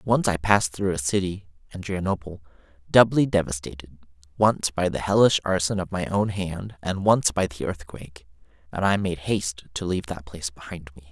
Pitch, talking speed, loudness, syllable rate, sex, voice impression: 90 Hz, 180 wpm, -24 LUFS, 5.2 syllables/s, male, masculine, middle-aged, relaxed, slightly weak, raspy, intellectual, slightly sincere, friendly, unique, slightly kind, modest